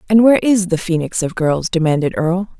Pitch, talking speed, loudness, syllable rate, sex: 180 Hz, 210 wpm, -16 LUFS, 6.0 syllables/s, female